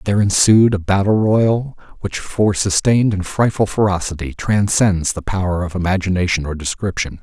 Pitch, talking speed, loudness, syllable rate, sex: 95 Hz, 150 wpm, -17 LUFS, 5.1 syllables/s, male